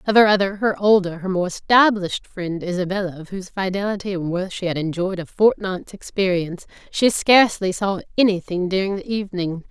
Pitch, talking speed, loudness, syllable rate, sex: 190 Hz, 175 wpm, -20 LUFS, 5.7 syllables/s, female